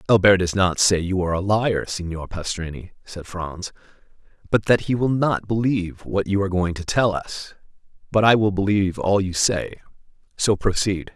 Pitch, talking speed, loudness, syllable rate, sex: 95 Hz, 180 wpm, -21 LUFS, 5.2 syllables/s, male